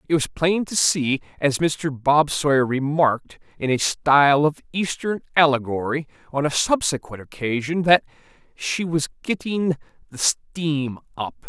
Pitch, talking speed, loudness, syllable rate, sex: 150 Hz, 140 wpm, -21 LUFS, 4.4 syllables/s, male